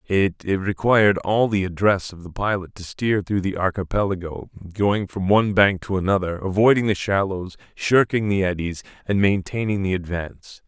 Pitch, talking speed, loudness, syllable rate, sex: 95 Hz, 165 wpm, -21 LUFS, 5.0 syllables/s, male